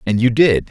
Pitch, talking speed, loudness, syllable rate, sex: 115 Hz, 255 wpm, -14 LUFS, 5.1 syllables/s, male